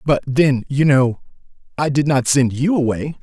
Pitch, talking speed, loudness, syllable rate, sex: 140 Hz, 185 wpm, -17 LUFS, 4.4 syllables/s, male